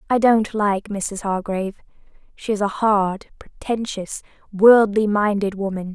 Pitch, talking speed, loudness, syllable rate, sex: 205 Hz, 130 wpm, -19 LUFS, 4.2 syllables/s, female